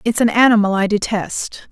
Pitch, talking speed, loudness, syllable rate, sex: 215 Hz, 175 wpm, -16 LUFS, 5.2 syllables/s, female